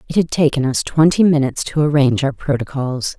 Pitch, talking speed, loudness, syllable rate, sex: 145 Hz, 190 wpm, -16 LUFS, 6.0 syllables/s, female